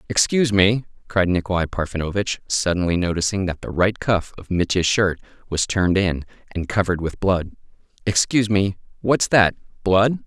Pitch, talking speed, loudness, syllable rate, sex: 95 Hz, 150 wpm, -20 LUFS, 5.3 syllables/s, male